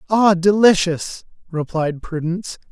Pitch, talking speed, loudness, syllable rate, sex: 180 Hz, 90 wpm, -18 LUFS, 4.2 syllables/s, male